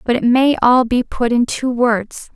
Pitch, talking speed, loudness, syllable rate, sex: 245 Hz, 230 wpm, -15 LUFS, 4.0 syllables/s, female